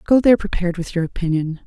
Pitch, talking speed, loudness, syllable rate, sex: 185 Hz, 215 wpm, -19 LUFS, 7.2 syllables/s, female